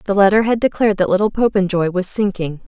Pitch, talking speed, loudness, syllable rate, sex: 200 Hz, 195 wpm, -16 LUFS, 6.5 syllables/s, female